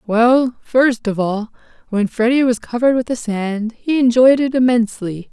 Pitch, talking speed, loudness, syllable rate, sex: 235 Hz, 170 wpm, -16 LUFS, 4.7 syllables/s, female